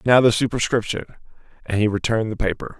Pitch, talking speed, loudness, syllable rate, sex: 110 Hz, 170 wpm, -21 LUFS, 6.8 syllables/s, male